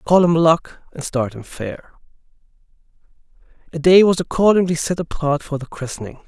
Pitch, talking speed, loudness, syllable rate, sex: 155 Hz, 155 wpm, -18 LUFS, 5.1 syllables/s, male